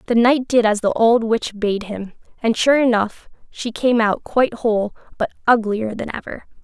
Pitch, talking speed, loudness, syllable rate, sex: 225 Hz, 190 wpm, -19 LUFS, 4.8 syllables/s, female